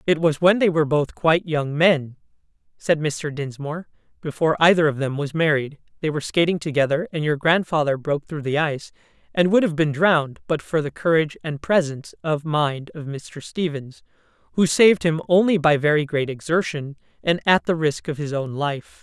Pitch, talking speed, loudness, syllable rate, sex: 155 Hz, 190 wpm, -21 LUFS, 5.5 syllables/s, female